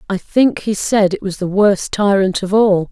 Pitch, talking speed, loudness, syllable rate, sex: 200 Hz, 225 wpm, -15 LUFS, 4.4 syllables/s, female